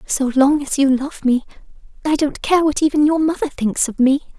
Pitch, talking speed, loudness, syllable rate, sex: 280 Hz, 220 wpm, -17 LUFS, 5.3 syllables/s, female